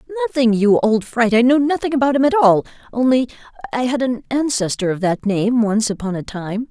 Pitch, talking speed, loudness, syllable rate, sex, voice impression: 235 Hz, 195 wpm, -17 LUFS, 5.8 syllables/s, female, feminine, adult-like, slightly dark, clear, fluent, intellectual, elegant, lively, slightly strict, slightly sharp